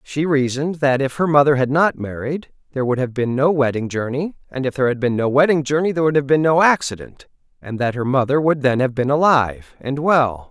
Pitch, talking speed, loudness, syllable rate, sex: 140 Hz, 235 wpm, -18 LUFS, 5.9 syllables/s, male